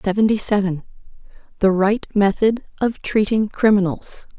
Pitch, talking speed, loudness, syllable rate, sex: 205 Hz, 110 wpm, -19 LUFS, 4.6 syllables/s, female